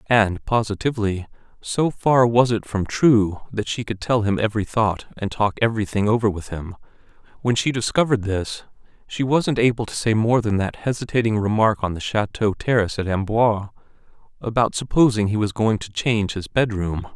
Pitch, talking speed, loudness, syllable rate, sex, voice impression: 110 Hz, 175 wpm, -21 LUFS, 5.3 syllables/s, male, masculine, very adult-like, middle-aged, very thick, slightly tensed, slightly weak, slightly dark, slightly hard, slightly muffled, fluent, cool, very intellectual, slightly refreshing, very sincere, very calm, mature, friendly, reassuring, slightly unique, elegant, slightly wild, very sweet, lively, kind, slightly modest